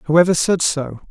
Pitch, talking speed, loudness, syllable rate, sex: 165 Hz, 165 wpm, -17 LUFS, 4.0 syllables/s, male